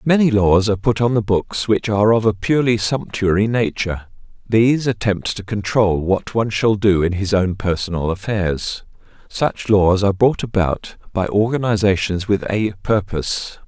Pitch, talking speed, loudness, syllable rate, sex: 105 Hz, 160 wpm, -18 LUFS, 4.9 syllables/s, male